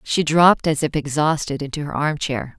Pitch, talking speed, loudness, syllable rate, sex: 150 Hz, 185 wpm, -19 LUFS, 5.2 syllables/s, female